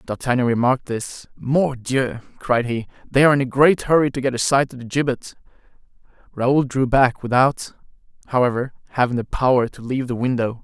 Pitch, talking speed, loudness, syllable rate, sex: 130 Hz, 175 wpm, -20 LUFS, 5.5 syllables/s, male